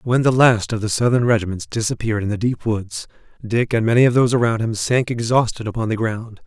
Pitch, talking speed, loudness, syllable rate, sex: 115 Hz, 225 wpm, -19 LUFS, 6.0 syllables/s, male